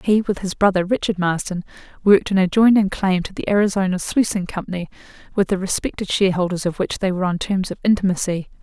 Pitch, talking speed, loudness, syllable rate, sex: 190 Hz, 190 wpm, -20 LUFS, 6.4 syllables/s, female